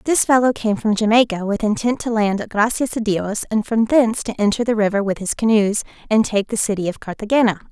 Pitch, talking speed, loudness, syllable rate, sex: 215 Hz, 225 wpm, -18 LUFS, 5.9 syllables/s, female